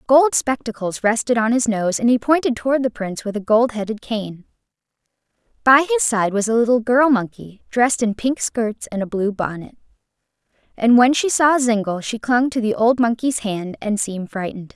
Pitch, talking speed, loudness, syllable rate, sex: 230 Hz, 195 wpm, -18 LUFS, 5.3 syllables/s, female